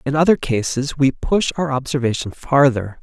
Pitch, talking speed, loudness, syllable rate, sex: 135 Hz, 160 wpm, -18 LUFS, 4.9 syllables/s, male